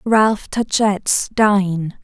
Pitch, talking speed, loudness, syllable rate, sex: 205 Hz, 90 wpm, -17 LUFS, 5.3 syllables/s, female